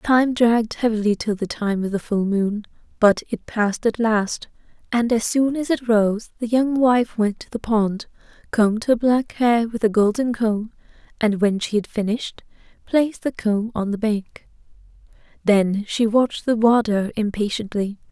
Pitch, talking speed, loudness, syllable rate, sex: 220 Hz, 175 wpm, -20 LUFS, 4.6 syllables/s, female